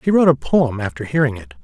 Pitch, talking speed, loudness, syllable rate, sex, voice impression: 125 Hz, 255 wpm, -18 LUFS, 6.8 syllables/s, male, masculine, adult-like, tensed, powerful, clear, slightly mature, friendly, wild, lively, slightly kind